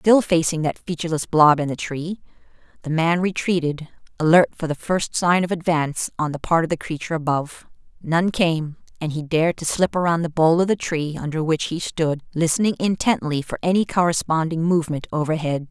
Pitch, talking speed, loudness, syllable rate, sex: 165 Hz, 185 wpm, -21 LUFS, 5.6 syllables/s, female